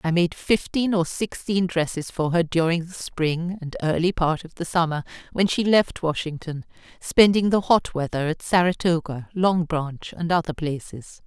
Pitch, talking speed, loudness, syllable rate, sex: 170 Hz, 170 wpm, -23 LUFS, 4.6 syllables/s, female